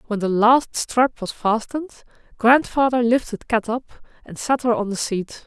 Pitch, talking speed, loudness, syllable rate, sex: 230 Hz, 175 wpm, -20 LUFS, 4.5 syllables/s, female